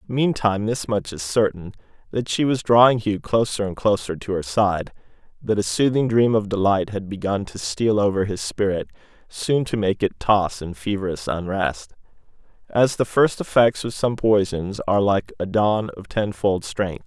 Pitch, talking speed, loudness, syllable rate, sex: 100 Hz, 180 wpm, -21 LUFS, 4.7 syllables/s, male